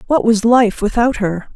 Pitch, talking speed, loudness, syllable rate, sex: 225 Hz, 195 wpm, -15 LUFS, 4.4 syllables/s, female